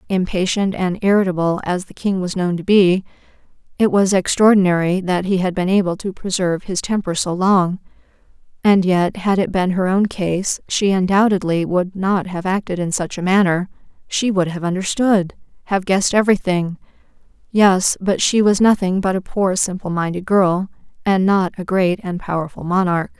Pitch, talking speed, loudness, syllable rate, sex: 185 Hz, 170 wpm, -18 LUFS, 5.0 syllables/s, female